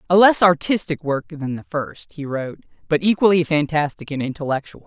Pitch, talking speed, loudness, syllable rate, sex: 160 Hz, 175 wpm, -19 LUFS, 5.5 syllables/s, female